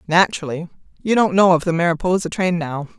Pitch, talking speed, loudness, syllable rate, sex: 175 Hz, 180 wpm, -18 LUFS, 6.2 syllables/s, female